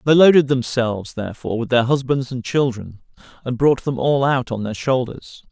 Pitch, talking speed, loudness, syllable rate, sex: 125 Hz, 185 wpm, -19 LUFS, 5.3 syllables/s, male